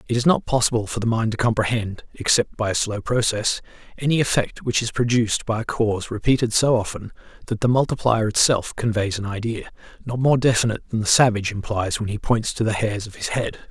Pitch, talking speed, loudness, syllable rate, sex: 115 Hz, 210 wpm, -21 LUFS, 5.9 syllables/s, male